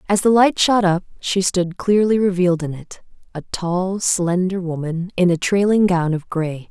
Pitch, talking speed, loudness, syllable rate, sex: 185 Hz, 180 wpm, -18 LUFS, 4.5 syllables/s, female